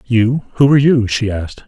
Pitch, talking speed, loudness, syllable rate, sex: 120 Hz, 180 wpm, -14 LUFS, 5.8 syllables/s, male